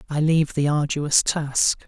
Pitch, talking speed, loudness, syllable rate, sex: 150 Hz, 160 wpm, -21 LUFS, 4.3 syllables/s, male